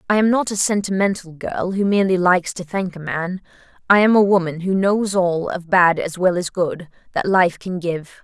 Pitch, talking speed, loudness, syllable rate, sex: 185 Hz, 220 wpm, -19 LUFS, 5.0 syllables/s, female